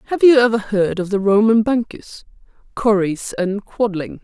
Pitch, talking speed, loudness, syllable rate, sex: 210 Hz, 155 wpm, -17 LUFS, 4.9 syllables/s, female